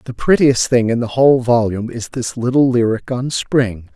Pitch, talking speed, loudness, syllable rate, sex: 120 Hz, 195 wpm, -16 LUFS, 5.0 syllables/s, male